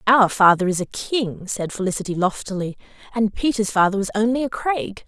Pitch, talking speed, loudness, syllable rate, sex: 210 Hz, 175 wpm, -21 LUFS, 5.4 syllables/s, female